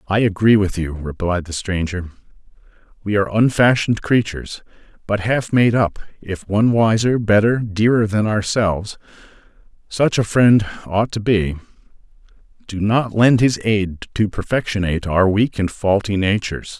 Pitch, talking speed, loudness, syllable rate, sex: 105 Hz, 135 wpm, -18 LUFS, 4.8 syllables/s, male